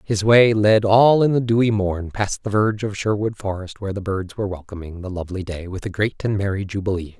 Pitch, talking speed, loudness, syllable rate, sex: 100 Hz, 235 wpm, -20 LUFS, 5.8 syllables/s, male